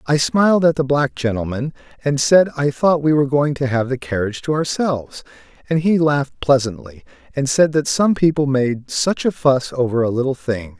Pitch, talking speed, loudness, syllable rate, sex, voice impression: 140 Hz, 200 wpm, -18 LUFS, 5.3 syllables/s, male, masculine, adult-like, slightly soft, slightly refreshing, friendly, slightly sweet